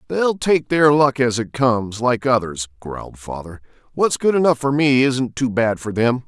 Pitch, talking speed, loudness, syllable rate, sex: 125 Hz, 200 wpm, -18 LUFS, 4.6 syllables/s, male